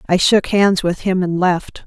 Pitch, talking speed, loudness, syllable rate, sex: 185 Hz, 225 wpm, -16 LUFS, 4.2 syllables/s, female